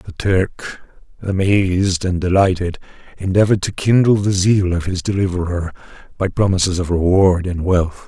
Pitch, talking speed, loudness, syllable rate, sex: 95 Hz, 140 wpm, -17 LUFS, 5.0 syllables/s, male